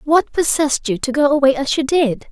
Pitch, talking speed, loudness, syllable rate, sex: 280 Hz, 235 wpm, -16 LUFS, 5.5 syllables/s, female